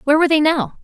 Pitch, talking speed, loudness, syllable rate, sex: 295 Hz, 285 wpm, -15 LUFS, 8.6 syllables/s, female